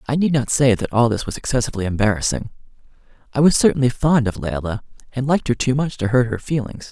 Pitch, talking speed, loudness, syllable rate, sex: 125 Hz, 215 wpm, -19 LUFS, 6.6 syllables/s, male